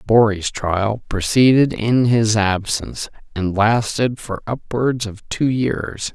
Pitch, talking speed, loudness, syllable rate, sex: 110 Hz, 125 wpm, -18 LUFS, 3.6 syllables/s, male